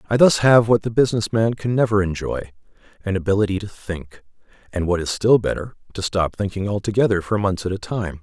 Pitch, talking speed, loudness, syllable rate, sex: 100 Hz, 205 wpm, -20 LUFS, 5.8 syllables/s, male